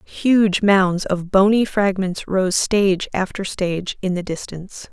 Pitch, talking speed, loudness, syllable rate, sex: 190 Hz, 145 wpm, -19 LUFS, 4.0 syllables/s, female